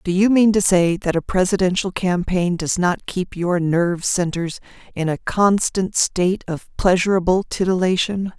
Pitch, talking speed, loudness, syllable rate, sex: 180 Hz, 155 wpm, -19 LUFS, 4.6 syllables/s, female